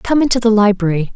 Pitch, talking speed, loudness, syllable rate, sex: 220 Hz, 205 wpm, -14 LUFS, 6.4 syllables/s, female